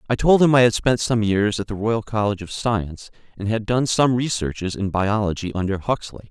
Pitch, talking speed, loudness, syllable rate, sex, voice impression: 110 Hz, 220 wpm, -20 LUFS, 5.5 syllables/s, male, very masculine, very adult-like, slightly thick, slightly relaxed, slightly weak, slightly dark, soft, slightly clear, fluent, cool, very intellectual, slightly refreshing, sincere, very calm, slightly mature, friendly, reassuring, slightly unique, elegant, slightly wild, sweet, slightly lively, kind, modest